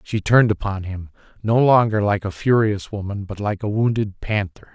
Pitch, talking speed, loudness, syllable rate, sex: 105 Hz, 190 wpm, -20 LUFS, 5.1 syllables/s, male